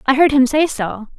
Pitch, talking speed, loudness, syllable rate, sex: 270 Hz, 255 wpm, -15 LUFS, 4.9 syllables/s, female